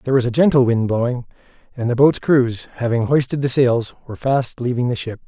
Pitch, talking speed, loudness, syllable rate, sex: 125 Hz, 215 wpm, -18 LUFS, 6.0 syllables/s, male